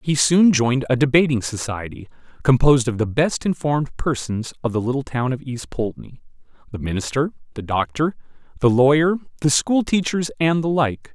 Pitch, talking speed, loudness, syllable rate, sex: 135 Hz, 155 wpm, -20 LUFS, 5.3 syllables/s, male